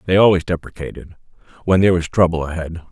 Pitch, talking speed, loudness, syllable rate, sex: 85 Hz, 165 wpm, -17 LUFS, 6.7 syllables/s, male